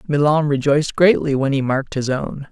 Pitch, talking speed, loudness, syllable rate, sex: 140 Hz, 190 wpm, -18 LUFS, 5.6 syllables/s, male